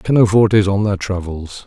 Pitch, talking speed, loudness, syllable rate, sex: 100 Hz, 145 wpm, -15 LUFS, 4.9 syllables/s, male